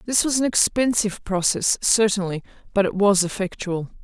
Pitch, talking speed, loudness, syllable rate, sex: 205 Hz, 150 wpm, -21 LUFS, 5.2 syllables/s, female